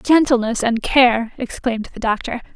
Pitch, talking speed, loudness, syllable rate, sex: 240 Hz, 140 wpm, -18 LUFS, 4.7 syllables/s, female